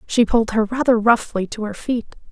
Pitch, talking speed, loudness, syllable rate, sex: 225 Hz, 210 wpm, -19 LUFS, 5.4 syllables/s, female